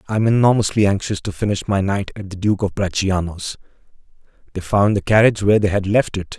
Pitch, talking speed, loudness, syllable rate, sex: 100 Hz, 205 wpm, -18 LUFS, 6.2 syllables/s, male